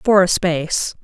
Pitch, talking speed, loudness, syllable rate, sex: 180 Hz, 175 wpm, -17 LUFS, 4.5 syllables/s, female